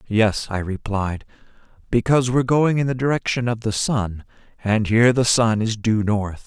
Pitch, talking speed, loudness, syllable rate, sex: 115 Hz, 175 wpm, -20 LUFS, 4.9 syllables/s, male